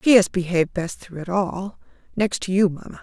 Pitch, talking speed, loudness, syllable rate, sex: 190 Hz, 200 wpm, -22 LUFS, 5.5 syllables/s, female